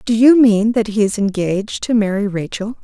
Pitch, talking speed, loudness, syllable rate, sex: 215 Hz, 210 wpm, -15 LUFS, 5.2 syllables/s, female